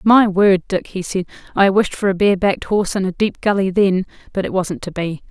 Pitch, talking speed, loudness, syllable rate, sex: 190 Hz, 250 wpm, -17 LUFS, 5.4 syllables/s, female